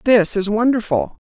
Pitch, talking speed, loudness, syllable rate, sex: 215 Hz, 140 wpm, -17 LUFS, 4.6 syllables/s, female